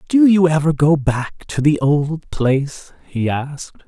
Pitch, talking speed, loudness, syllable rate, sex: 150 Hz, 170 wpm, -17 LUFS, 4.0 syllables/s, male